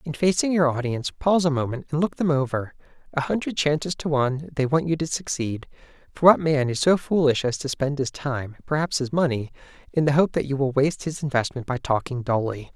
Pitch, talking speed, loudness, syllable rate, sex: 145 Hz, 215 wpm, -23 LUFS, 5.8 syllables/s, male